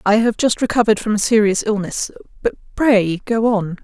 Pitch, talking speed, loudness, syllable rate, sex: 210 Hz, 170 wpm, -17 LUFS, 5.3 syllables/s, female